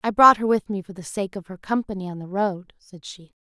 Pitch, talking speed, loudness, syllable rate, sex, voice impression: 195 Hz, 280 wpm, -22 LUFS, 5.6 syllables/s, female, very feminine, slightly young, very thin, tensed, powerful, slightly bright, soft, muffled, fluent, raspy, very cute, slightly cool, intellectual, refreshing, very sincere, calm, very friendly, very reassuring, very unique, very elegant, slightly wild, very sweet, lively, kind, slightly intense, slightly sharp, modest, light